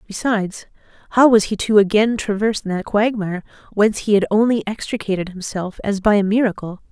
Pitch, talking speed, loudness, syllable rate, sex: 205 Hz, 165 wpm, -18 LUFS, 5.8 syllables/s, female